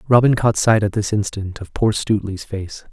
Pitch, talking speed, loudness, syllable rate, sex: 105 Hz, 205 wpm, -19 LUFS, 5.2 syllables/s, male